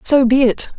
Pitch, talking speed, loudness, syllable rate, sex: 255 Hz, 230 wpm, -14 LUFS, 4.6 syllables/s, female